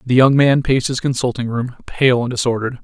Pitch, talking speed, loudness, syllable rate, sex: 125 Hz, 210 wpm, -16 LUFS, 6.1 syllables/s, male